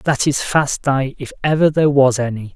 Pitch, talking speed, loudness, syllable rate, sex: 135 Hz, 210 wpm, -17 LUFS, 5.0 syllables/s, male